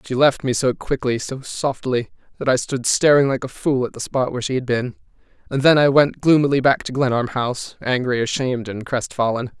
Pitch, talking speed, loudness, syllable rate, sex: 130 Hz, 215 wpm, -19 LUFS, 5.5 syllables/s, male